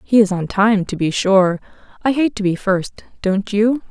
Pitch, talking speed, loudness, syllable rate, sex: 205 Hz, 215 wpm, -17 LUFS, 4.6 syllables/s, female